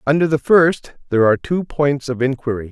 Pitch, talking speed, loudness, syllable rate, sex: 140 Hz, 200 wpm, -17 LUFS, 5.8 syllables/s, male